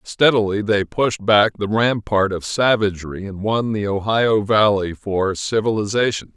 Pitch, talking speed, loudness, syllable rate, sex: 105 Hz, 140 wpm, -19 LUFS, 4.4 syllables/s, male